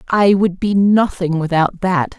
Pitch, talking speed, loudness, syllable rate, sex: 185 Hz, 165 wpm, -15 LUFS, 4.0 syllables/s, female